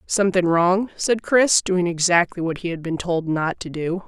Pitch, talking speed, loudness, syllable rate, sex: 175 Hz, 205 wpm, -20 LUFS, 4.7 syllables/s, female